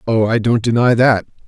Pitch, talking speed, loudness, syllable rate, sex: 115 Hz, 205 wpm, -15 LUFS, 5.3 syllables/s, male